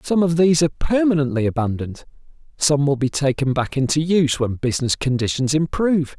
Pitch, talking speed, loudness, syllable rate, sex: 145 Hz, 165 wpm, -19 LUFS, 6.1 syllables/s, male